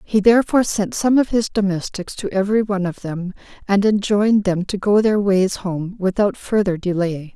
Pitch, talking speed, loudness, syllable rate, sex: 200 Hz, 190 wpm, -19 LUFS, 5.2 syllables/s, female